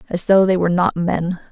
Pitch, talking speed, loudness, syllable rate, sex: 180 Hz, 235 wpm, -17 LUFS, 5.7 syllables/s, female